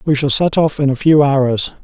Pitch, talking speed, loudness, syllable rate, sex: 140 Hz, 260 wpm, -14 LUFS, 4.9 syllables/s, male